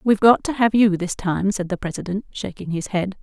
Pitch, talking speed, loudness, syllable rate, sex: 195 Hz, 240 wpm, -21 LUFS, 5.4 syllables/s, female